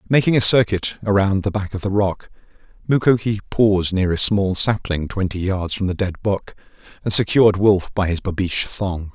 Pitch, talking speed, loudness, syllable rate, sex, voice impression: 100 Hz, 185 wpm, -19 LUFS, 5.1 syllables/s, male, very masculine, very middle-aged, very thick, very tensed, slightly weak, dark, soft, muffled, fluent, raspy, very cool, intellectual, slightly refreshing, sincere, calm, very mature, friendly, very reassuring, unique, slightly elegant, wild, slightly sweet, lively, kind, intense